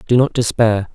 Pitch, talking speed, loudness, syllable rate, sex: 110 Hz, 190 wpm, -16 LUFS, 5.2 syllables/s, male